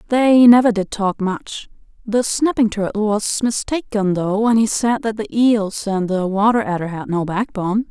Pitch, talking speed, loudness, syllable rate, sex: 210 Hz, 180 wpm, -17 LUFS, 4.5 syllables/s, female